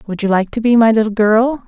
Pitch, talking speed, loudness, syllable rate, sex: 220 Hz, 285 wpm, -13 LUFS, 5.9 syllables/s, female